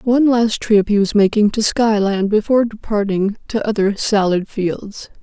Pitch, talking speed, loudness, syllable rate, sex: 210 Hz, 160 wpm, -16 LUFS, 4.7 syllables/s, female